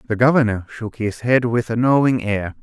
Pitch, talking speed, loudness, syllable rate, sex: 115 Hz, 205 wpm, -18 LUFS, 5.1 syllables/s, male